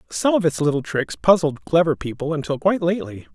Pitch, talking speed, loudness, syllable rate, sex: 160 Hz, 195 wpm, -20 LUFS, 6.2 syllables/s, male